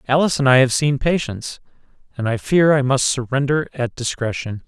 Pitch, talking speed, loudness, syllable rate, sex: 135 Hz, 180 wpm, -18 LUFS, 5.6 syllables/s, male